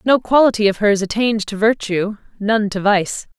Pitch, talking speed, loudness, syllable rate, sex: 210 Hz, 175 wpm, -17 LUFS, 5.0 syllables/s, female